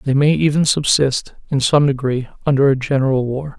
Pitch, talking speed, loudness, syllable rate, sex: 135 Hz, 185 wpm, -16 LUFS, 5.4 syllables/s, male